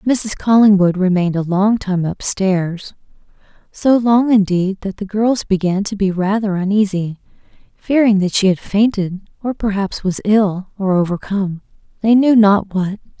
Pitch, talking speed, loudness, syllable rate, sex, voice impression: 200 Hz, 145 wpm, -16 LUFS, 4.5 syllables/s, female, feminine, slightly adult-like, soft, slightly cute, friendly, slightly sweet, kind